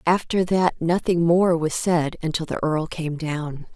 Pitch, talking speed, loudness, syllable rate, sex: 165 Hz, 175 wpm, -22 LUFS, 3.9 syllables/s, female